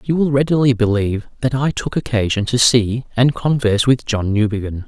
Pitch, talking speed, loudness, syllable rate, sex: 120 Hz, 185 wpm, -17 LUFS, 5.5 syllables/s, male